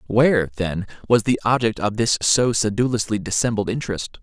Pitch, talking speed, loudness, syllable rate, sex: 110 Hz, 155 wpm, -20 LUFS, 5.5 syllables/s, male